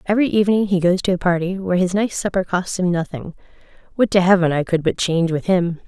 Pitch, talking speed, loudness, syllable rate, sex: 180 Hz, 235 wpm, -18 LUFS, 6.5 syllables/s, female